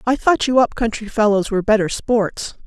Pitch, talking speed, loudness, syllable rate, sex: 225 Hz, 205 wpm, -18 LUFS, 5.3 syllables/s, female